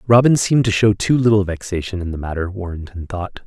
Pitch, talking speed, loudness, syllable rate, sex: 100 Hz, 210 wpm, -18 LUFS, 6.1 syllables/s, male